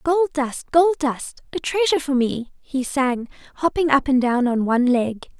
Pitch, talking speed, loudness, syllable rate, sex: 275 Hz, 190 wpm, -20 LUFS, 4.9 syllables/s, female